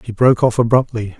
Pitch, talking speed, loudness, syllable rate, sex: 115 Hz, 200 wpm, -15 LUFS, 6.4 syllables/s, male